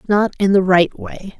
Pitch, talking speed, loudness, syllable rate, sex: 190 Hz, 215 wpm, -15 LUFS, 4.4 syllables/s, female